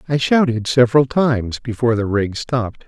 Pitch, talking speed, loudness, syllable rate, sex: 120 Hz, 165 wpm, -17 LUFS, 5.5 syllables/s, male